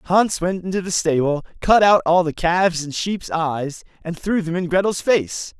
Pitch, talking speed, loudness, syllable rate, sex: 175 Hz, 205 wpm, -19 LUFS, 4.5 syllables/s, male